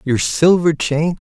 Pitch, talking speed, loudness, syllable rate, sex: 160 Hz, 140 wpm, -15 LUFS, 3.6 syllables/s, male